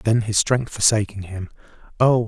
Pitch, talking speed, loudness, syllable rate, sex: 110 Hz, 160 wpm, -20 LUFS, 4.6 syllables/s, male